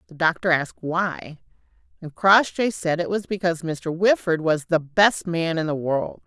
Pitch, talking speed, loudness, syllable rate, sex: 170 Hz, 180 wpm, -22 LUFS, 4.6 syllables/s, female